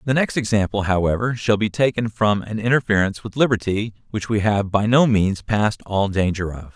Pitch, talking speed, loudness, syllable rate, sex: 105 Hz, 195 wpm, -20 LUFS, 5.5 syllables/s, male